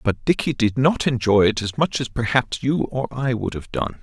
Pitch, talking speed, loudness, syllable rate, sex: 125 Hz, 240 wpm, -21 LUFS, 4.8 syllables/s, male